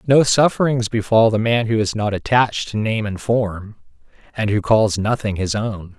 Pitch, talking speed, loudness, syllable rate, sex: 110 Hz, 190 wpm, -18 LUFS, 4.7 syllables/s, male